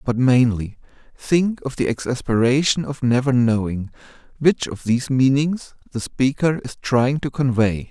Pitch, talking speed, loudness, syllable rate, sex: 130 Hz, 145 wpm, -20 LUFS, 4.4 syllables/s, male